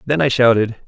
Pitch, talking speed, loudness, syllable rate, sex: 115 Hz, 205 wpm, -15 LUFS, 5.3 syllables/s, male